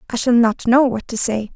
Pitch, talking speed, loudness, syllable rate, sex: 235 Hz, 270 wpm, -17 LUFS, 5.1 syllables/s, female